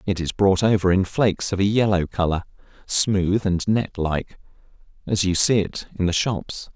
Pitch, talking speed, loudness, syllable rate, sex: 95 Hz, 185 wpm, -21 LUFS, 4.6 syllables/s, male